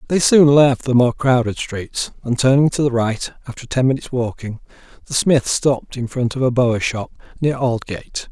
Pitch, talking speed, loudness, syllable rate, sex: 125 Hz, 195 wpm, -18 LUFS, 5.3 syllables/s, male